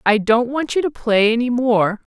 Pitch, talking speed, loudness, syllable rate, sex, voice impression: 235 Hz, 225 wpm, -17 LUFS, 4.6 syllables/s, female, feminine, adult-like, tensed, hard, clear, halting, calm, friendly, reassuring, lively, kind